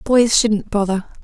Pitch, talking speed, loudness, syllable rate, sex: 215 Hz, 145 wpm, -17 LUFS, 3.9 syllables/s, female